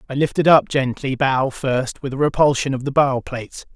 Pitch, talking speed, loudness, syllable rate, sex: 135 Hz, 210 wpm, -19 LUFS, 5.2 syllables/s, male